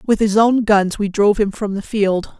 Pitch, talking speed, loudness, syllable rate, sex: 205 Hz, 250 wpm, -16 LUFS, 4.9 syllables/s, female